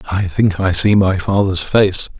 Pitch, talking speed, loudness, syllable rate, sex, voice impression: 95 Hz, 190 wpm, -15 LUFS, 4.3 syllables/s, male, masculine, very adult-like, cool, slightly intellectual, calm